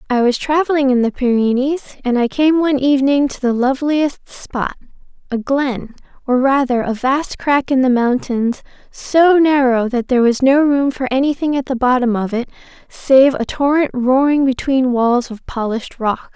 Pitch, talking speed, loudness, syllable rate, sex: 265 Hz, 170 wpm, -16 LUFS, 4.9 syllables/s, female